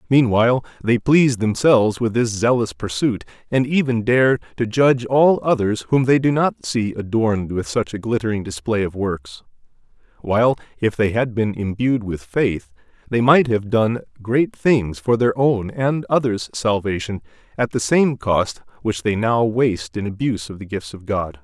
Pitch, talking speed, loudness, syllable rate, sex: 115 Hz, 175 wpm, -19 LUFS, 4.6 syllables/s, male